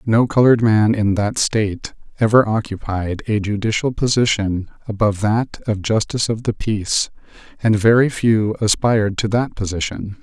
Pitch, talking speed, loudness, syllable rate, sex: 110 Hz, 145 wpm, -18 LUFS, 5.0 syllables/s, male